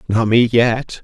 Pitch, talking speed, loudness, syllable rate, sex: 115 Hz, 175 wpm, -15 LUFS, 3.7 syllables/s, male